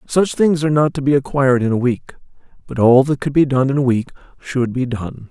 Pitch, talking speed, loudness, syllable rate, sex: 135 Hz, 250 wpm, -16 LUFS, 5.7 syllables/s, male